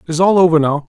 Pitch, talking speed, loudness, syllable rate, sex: 165 Hz, 315 wpm, -13 LUFS, 7.0 syllables/s, male